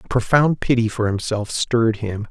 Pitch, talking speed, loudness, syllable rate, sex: 115 Hz, 180 wpm, -19 LUFS, 5.0 syllables/s, male